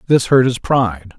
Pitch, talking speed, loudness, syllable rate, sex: 120 Hz, 200 wpm, -15 LUFS, 5.1 syllables/s, male